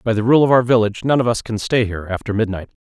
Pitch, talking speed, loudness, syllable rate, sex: 115 Hz, 295 wpm, -17 LUFS, 7.1 syllables/s, male